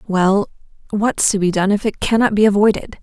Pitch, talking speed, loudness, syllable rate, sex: 205 Hz, 200 wpm, -16 LUFS, 5.3 syllables/s, female